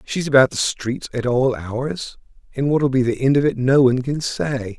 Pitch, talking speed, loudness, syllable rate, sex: 130 Hz, 225 wpm, -19 LUFS, 4.7 syllables/s, male